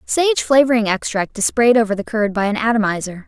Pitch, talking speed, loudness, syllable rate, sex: 225 Hz, 200 wpm, -17 LUFS, 5.7 syllables/s, female